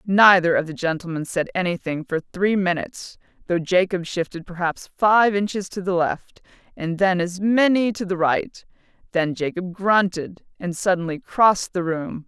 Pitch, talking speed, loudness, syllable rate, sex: 180 Hz, 160 wpm, -21 LUFS, 4.7 syllables/s, female